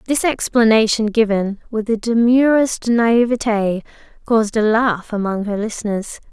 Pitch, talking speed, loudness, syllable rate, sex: 225 Hz, 125 wpm, -17 LUFS, 4.5 syllables/s, female